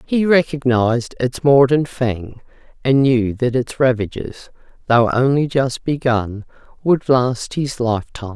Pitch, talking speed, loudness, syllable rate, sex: 125 Hz, 130 wpm, -17 LUFS, 4.1 syllables/s, female